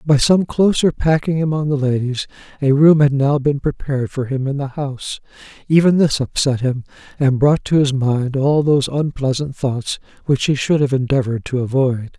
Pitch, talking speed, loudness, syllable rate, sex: 140 Hz, 185 wpm, -17 LUFS, 5.1 syllables/s, male